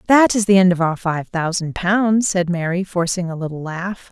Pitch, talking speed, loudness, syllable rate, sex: 180 Hz, 220 wpm, -18 LUFS, 4.8 syllables/s, female